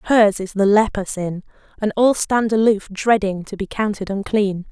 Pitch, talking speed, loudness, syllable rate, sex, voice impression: 205 Hz, 180 wpm, -19 LUFS, 4.7 syllables/s, female, feminine, slightly adult-like, slightly clear, slightly refreshing, friendly, reassuring